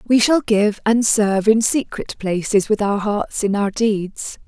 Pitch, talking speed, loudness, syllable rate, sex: 210 Hz, 190 wpm, -18 LUFS, 4.0 syllables/s, female